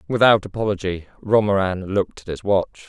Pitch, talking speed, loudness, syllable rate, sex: 100 Hz, 145 wpm, -20 LUFS, 5.5 syllables/s, male